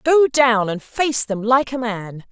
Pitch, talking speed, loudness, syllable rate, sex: 245 Hz, 205 wpm, -18 LUFS, 3.7 syllables/s, female